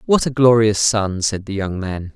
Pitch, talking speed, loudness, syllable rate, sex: 105 Hz, 225 wpm, -17 LUFS, 4.5 syllables/s, male